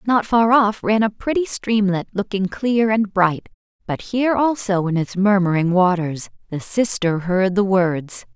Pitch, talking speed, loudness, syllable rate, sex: 200 Hz, 165 wpm, -19 LUFS, 4.3 syllables/s, female